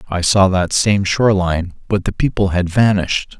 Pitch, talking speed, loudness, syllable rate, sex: 95 Hz, 195 wpm, -16 LUFS, 4.9 syllables/s, male